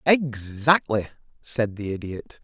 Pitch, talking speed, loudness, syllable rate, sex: 120 Hz, 100 wpm, -24 LUFS, 3.6 syllables/s, male